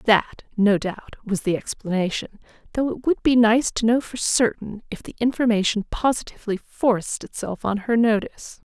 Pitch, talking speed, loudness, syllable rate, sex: 220 Hz, 165 wpm, -22 LUFS, 4.9 syllables/s, female